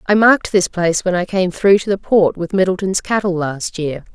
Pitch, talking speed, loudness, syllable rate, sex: 185 Hz, 230 wpm, -16 LUFS, 5.3 syllables/s, female